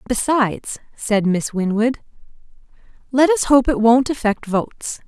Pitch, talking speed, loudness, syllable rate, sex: 235 Hz, 130 wpm, -18 LUFS, 4.4 syllables/s, female